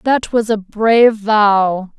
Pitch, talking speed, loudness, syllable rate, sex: 215 Hz, 150 wpm, -14 LUFS, 3.2 syllables/s, female